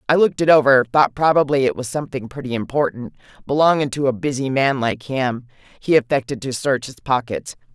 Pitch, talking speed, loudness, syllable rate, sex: 135 Hz, 180 wpm, -19 LUFS, 5.8 syllables/s, female